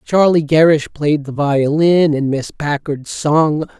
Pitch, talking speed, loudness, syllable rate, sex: 150 Hz, 140 wpm, -15 LUFS, 3.7 syllables/s, male